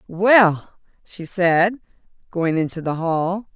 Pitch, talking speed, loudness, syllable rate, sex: 180 Hz, 120 wpm, -18 LUFS, 3.2 syllables/s, female